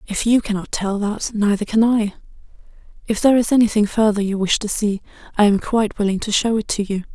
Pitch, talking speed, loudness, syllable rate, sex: 210 Hz, 220 wpm, -19 LUFS, 6.0 syllables/s, female